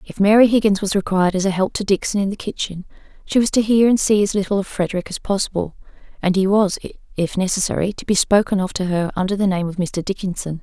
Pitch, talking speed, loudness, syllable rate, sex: 195 Hz, 235 wpm, -19 LUFS, 6.5 syllables/s, female